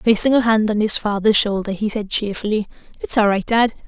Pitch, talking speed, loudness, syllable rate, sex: 215 Hz, 215 wpm, -18 LUFS, 5.7 syllables/s, female